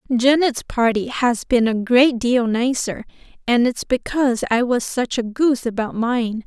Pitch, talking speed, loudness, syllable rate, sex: 245 Hz, 165 wpm, -19 LUFS, 4.3 syllables/s, female